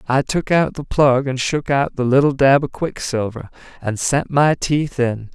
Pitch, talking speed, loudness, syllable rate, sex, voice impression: 135 Hz, 200 wpm, -18 LUFS, 4.3 syllables/s, male, very masculine, slightly young, slightly thick, tensed, slightly powerful, slightly dark, slightly soft, clear, fluent, slightly cool, intellectual, refreshing, slightly sincere, calm, slightly mature, very friendly, very reassuring, slightly unique, elegant, slightly wild, sweet, lively, kind, slightly modest